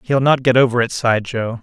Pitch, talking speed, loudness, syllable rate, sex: 120 Hz, 260 wpm, -16 LUFS, 5.9 syllables/s, male